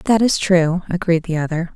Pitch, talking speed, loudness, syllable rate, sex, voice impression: 175 Hz, 205 wpm, -18 LUFS, 4.9 syllables/s, female, very feminine, slightly young, slightly adult-like, very thin, relaxed, weak, slightly bright, soft, slightly clear, fluent, slightly raspy, very cute, intellectual, very refreshing, sincere, slightly calm, very friendly, very reassuring, slightly unique, very elegant, slightly wild, very sweet, lively, very kind, slightly sharp, slightly modest, light